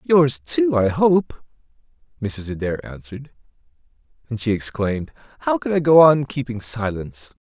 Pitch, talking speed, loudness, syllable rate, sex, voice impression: 120 Hz, 135 wpm, -19 LUFS, 4.8 syllables/s, male, masculine, adult-like, slightly thick, dark, cool, slightly sincere, slightly calm